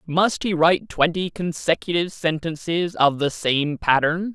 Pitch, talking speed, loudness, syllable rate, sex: 160 Hz, 140 wpm, -21 LUFS, 4.5 syllables/s, male